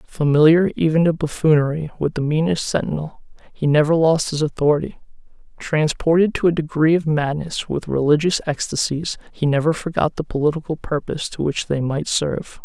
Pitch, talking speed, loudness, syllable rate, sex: 155 Hz, 155 wpm, -19 LUFS, 5.5 syllables/s, male